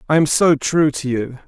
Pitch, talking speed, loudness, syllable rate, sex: 145 Hz, 245 wpm, -17 LUFS, 4.8 syllables/s, male